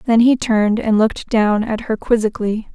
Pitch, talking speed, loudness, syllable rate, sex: 220 Hz, 195 wpm, -17 LUFS, 5.5 syllables/s, female